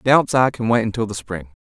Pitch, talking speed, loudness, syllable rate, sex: 115 Hz, 255 wpm, -19 LUFS, 7.0 syllables/s, male